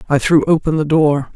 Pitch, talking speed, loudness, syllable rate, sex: 150 Hz, 220 wpm, -14 LUFS, 5.4 syllables/s, female